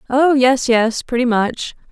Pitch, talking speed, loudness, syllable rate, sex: 250 Hz, 155 wpm, -16 LUFS, 3.8 syllables/s, female